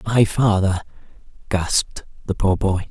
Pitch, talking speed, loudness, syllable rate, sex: 100 Hz, 125 wpm, -20 LUFS, 4.2 syllables/s, male